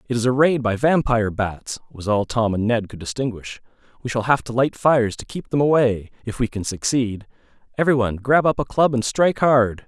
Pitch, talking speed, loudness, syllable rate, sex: 120 Hz, 225 wpm, -20 LUFS, 5.6 syllables/s, male